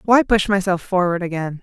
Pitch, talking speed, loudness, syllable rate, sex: 190 Hz, 185 wpm, -18 LUFS, 5.3 syllables/s, female